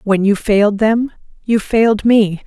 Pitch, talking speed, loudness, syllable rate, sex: 210 Hz, 170 wpm, -14 LUFS, 4.4 syllables/s, female